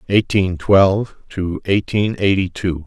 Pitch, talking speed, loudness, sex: 95 Hz, 125 wpm, -17 LUFS, male